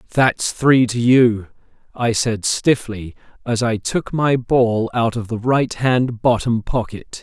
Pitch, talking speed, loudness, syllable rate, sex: 115 Hz, 150 wpm, -18 LUFS, 3.6 syllables/s, male